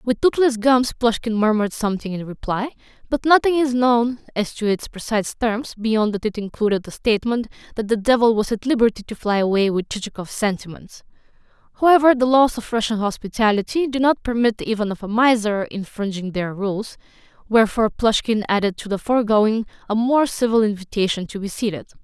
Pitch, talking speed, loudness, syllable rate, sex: 220 Hz, 175 wpm, -20 LUFS, 5.7 syllables/s, female